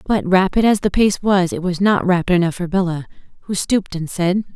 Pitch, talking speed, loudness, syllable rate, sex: 185 Hz, 225 wpm, -17 LUFS, 5.6 syllables/s, female